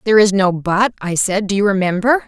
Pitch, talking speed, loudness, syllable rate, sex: 200 Hz, 235 wpm, -16 LUFS, 5.8 syllables/s, female